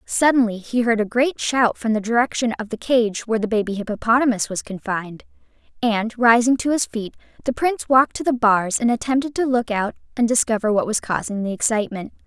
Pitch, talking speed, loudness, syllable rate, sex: 230 Hz, 200 wpm, -20 LUFS, 5.9 syllables/s, female